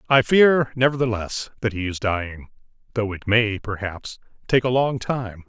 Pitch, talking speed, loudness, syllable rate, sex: 115 Hz, 155 wpm, -21 LUFS, 4.6 syllables/s, male